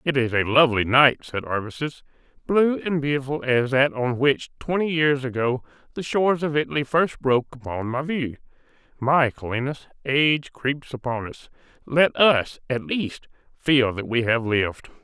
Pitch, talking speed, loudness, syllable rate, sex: 135 Hz, 155 wpm, -22 LUFS, 4.8 syllables/s, male